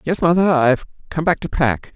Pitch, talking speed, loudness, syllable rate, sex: 155 Hz, 215 wpm, -18 LUFS, 5.7 syllables/s, male